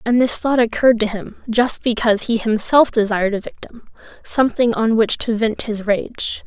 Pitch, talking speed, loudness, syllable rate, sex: 225 Hz, 185 wpm, -17 LUFS, 5.0 syllables/s, female